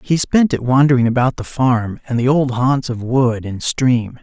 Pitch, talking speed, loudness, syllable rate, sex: 125 Hz, 215 wpm, -16 LUFS, 4.4 syllables/s, male